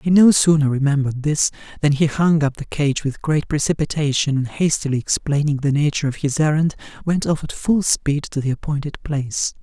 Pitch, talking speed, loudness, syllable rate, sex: 150 Hz, 195 wpm, -19 LUFS, 5.5 syllables/s, male